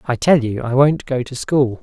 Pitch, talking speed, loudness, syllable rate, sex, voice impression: 130 Hz, 265 wpm, -17 LUFS, 4.8 syllables/s, male, masculine, adult-like, slightly fluent, refreshing, slightly sincere, slightly calm, slightly unique